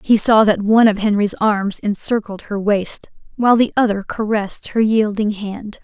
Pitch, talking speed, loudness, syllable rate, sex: 210 Hz, 175 wpm, -17 LUFS, 5.0 syllables/s, female